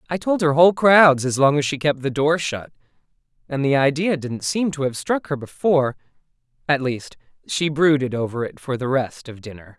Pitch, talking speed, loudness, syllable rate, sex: 145 Hz, 210 wpm, -20 LUFS, 5.2 syllables/s, male